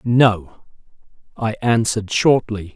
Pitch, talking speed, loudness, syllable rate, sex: 110 Hz, 85 wpm, -18 LUFS, 4.1 syllables/s, male